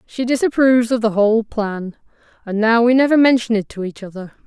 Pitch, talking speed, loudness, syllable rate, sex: 225 Hz, 200 wpm, -16 LUFS, 5.9 syllables/s, female